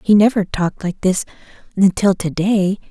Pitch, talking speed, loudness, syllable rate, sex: 195 Hz, 165 wpm, -17 LUFS, 5.0 syllables/s, female